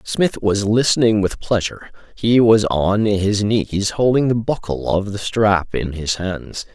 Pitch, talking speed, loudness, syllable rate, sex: 105 Hz, 170 wpm, -18 LUFS, 4.0 syllables/s, male